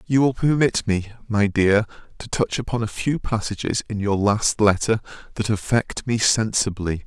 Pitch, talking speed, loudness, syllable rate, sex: 110 Hz, 170 wpm, -21 LUFS, 4.6 syllables/s, male